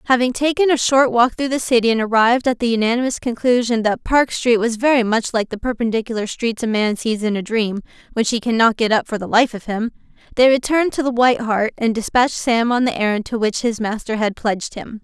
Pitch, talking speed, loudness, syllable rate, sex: 235 Hz, 235 wpm, -18 LUFS, 5.9 syllables/s, female